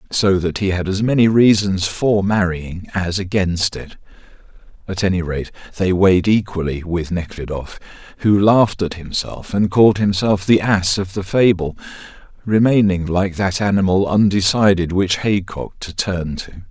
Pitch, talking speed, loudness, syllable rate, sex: 95 Hz, 150 wpm, -17 LUFS, 4.6 syllables/s, male